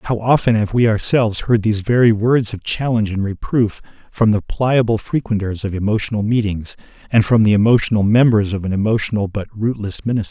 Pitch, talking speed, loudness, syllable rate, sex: 110 Hz, 180 wpm, -17 LUFS, 5.8 syllables/s, male